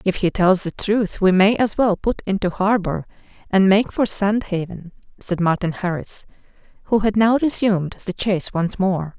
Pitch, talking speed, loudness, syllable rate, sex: 195 Hz, 185 wpm, -19 LUFS, 4.7 syllables/s, female